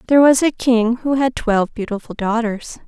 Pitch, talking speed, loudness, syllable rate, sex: 235 Hz, 190 wpm, -17 LUFS, 5.3 syllables/s, female